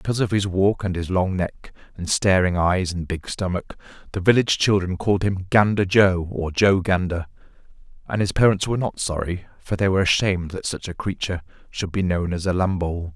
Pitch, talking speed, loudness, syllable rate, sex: 95 Hz, 200 wpm, -22 LUFS, 5.6 syllables/s, male